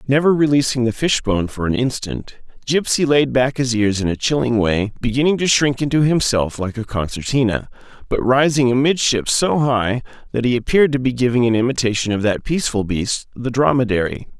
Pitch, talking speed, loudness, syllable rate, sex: 125 Hz, 180 wpm, -18 LUFS, 5.5 syllables/s, male